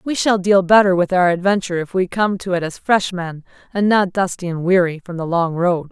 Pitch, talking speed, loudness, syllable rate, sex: 185 Hz, 245 wpm, -17 LUFS, 5.5 syllables/s, female